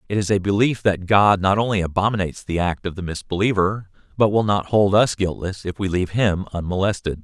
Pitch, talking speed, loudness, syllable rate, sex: 100 Hz, 205 wpm, -20 LUFS, 5.8 syllables/s, male